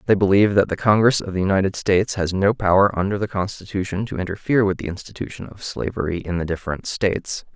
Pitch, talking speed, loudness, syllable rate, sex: 100 Hz, 205 wpm, -21 LUFS, 6.6 syllables/s, male